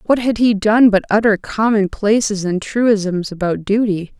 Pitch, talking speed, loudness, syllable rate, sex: 210 Hz, 170 wpm, -16 LUFS, 4.3 syllables/s, female